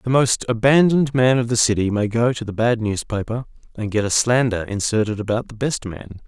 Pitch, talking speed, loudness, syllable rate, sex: 115 Hz, 210 wpm, -19 LUFS, 5.4 syllables/s, male